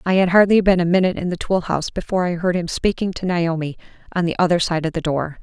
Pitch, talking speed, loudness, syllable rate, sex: 175 Hz, 265 wpm, -19 LUFS, 6.7 syllables/s, female